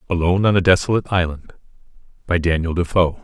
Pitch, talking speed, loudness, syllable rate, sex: 90 Hz, 150 wpm, -18 LUFS, 7.0 syllables/s, male